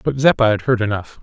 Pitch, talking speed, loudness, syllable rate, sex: 115 Hz, 245 wpm, -17 LUFS, 6.2 syllables/s, male